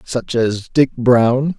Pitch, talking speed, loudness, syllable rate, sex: 125 Hz, 150 wpm, -16 LUFS, 2.7 syllables/s, male